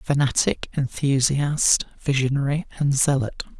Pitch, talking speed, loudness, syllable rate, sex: 140 Hz, 85 wpm, -22 LUFS, 4.3 syllables/s, male